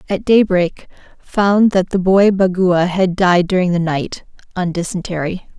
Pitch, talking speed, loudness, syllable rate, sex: 185 Hz, 150 wpm, -15 LUFS, 4.2 syllables/s, female